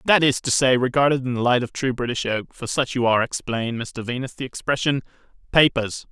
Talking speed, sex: 215 wpm, male